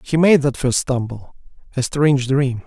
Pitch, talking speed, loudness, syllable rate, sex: 135 Hz, 180 wpm, -18 LUFS, 4.6 syllables/s, male